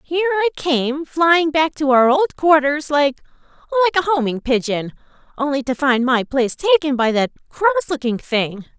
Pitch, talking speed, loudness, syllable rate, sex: 290 Hz, 165 wpm, -18 LUFS, 4.9 syllables/s, female